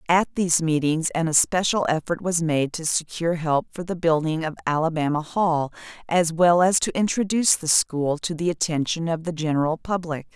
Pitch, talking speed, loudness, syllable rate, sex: 165 Hz, 180 wpm, -22 LUFS, 5.2 syllables/s, female